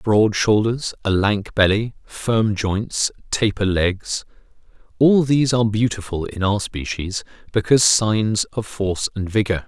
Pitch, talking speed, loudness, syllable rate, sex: 105 Hz, 135 wpm, -20 LUFS, 4.2 syllables/s, male